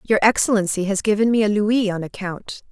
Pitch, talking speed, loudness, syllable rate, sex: 205 Hz, 200 wpm, -19 LUFS, 5.7 syllables/s, female